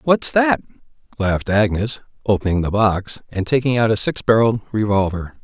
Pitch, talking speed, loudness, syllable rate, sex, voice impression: 110 Hz, 155 wpm, -18 LUFS, 5.3 syllables/s, male, masculine, adult-like, thick, tensed, powerful, clear, fluent, slightly raspy, cool, intellectual, mature, wild, lively, slightly kind